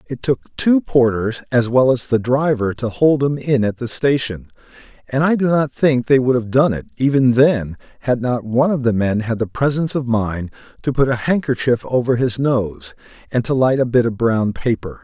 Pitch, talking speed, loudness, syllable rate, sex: 125 Hz, 215 wpm, -17 LUFS, 5.0 syllables/s, male